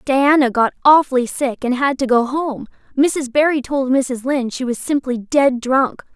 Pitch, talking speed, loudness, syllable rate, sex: 265 Hz, 185 wpm, -17 LUFS, 4.5 syllables/s, female